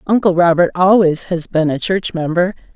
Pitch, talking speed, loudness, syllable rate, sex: 175 Hz, 175 wpm, -15 LUFS, 5.0 syllables/s, female